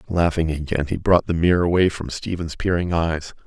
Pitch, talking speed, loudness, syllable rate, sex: 85 Hz, 190 wpm, -21 LUFS, 5.4 syllables/s, male